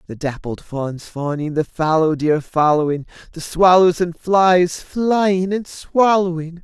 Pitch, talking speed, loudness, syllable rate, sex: 170 Hz, 135 wpm, -17 LUFS, 3.7 syllables/s, male